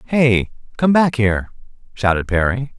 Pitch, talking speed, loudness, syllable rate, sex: 120 Hz, 130 wpm, -17 LUFS, 4.8 syllables/s, male